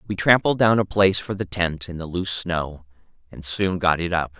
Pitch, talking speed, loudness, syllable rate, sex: 90 Hz, 230 wpm, -21 LUFS, 5.3 syllables/s, male